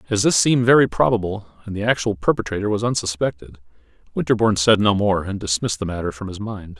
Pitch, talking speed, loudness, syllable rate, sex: 100 Hz, 195 wpm, -20 LUFS, 6.6 syllables/s, male